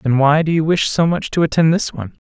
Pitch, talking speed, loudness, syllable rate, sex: 155 Hz, 290 wpm, -16 LUFS, 6.2 syllables/s, male